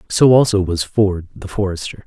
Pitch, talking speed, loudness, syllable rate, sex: 95 Hz, 175 wpm, -16 LUFS, 5.0 syllables/s, male